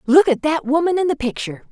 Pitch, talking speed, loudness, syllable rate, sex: 295 Hz, 245 wpm, -18 LUFS, 6.6 syllables/s, female